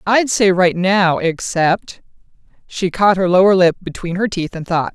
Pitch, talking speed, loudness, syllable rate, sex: 185 Hz, 180 wpm, -15 LUFS, 4.3 syllables/s, female